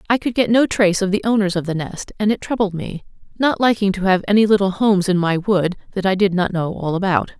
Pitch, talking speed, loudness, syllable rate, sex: 195 Hz, 260 wpm, -18 LUFS, 6.1 syllables/s, female